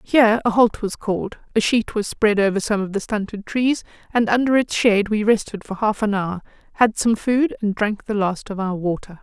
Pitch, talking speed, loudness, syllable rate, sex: 215 Hz, 230 wpm, -20 LUFS, 5.2 syllables/s, female